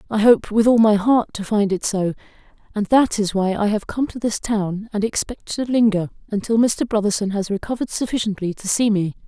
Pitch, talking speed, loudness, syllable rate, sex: 215 Hz, 215 wpm, -20 LUFS, 5.4 syllables/s, female